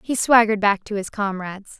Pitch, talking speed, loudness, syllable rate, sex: 210 Hz, 200 wpm, -19 LUFS, 5.9 syllables/s, female